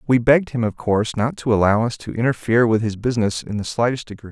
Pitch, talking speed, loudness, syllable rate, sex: 115 Hz, 250 wpm, -19 LUFS, 6.7 syllables/s, male